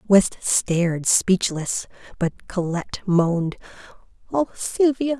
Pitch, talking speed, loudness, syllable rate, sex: 195 Hz, 90 wpm, -22 LUFS, 3.6 syllables/s, female